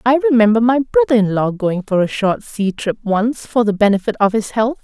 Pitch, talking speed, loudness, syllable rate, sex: 225 Hz, 235 wpm, -16 LUFS, 5.1 syllables/s, female